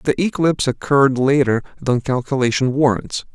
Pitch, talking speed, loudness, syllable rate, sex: 135 Hz, 125 wpm, -18 LUFS, 5.4 syllables/s, male